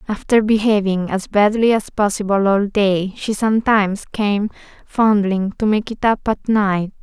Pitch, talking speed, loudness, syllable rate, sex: 205 Hz, 155 wpm, -17 LUFS, 4.5 syllables/s, female